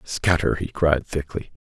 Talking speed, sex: 145 wpm, male